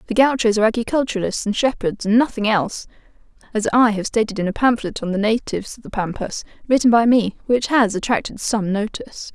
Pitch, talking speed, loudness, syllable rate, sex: 220 Hz, 195 wpm, -19 LUFS, 6.0 syllables/s, female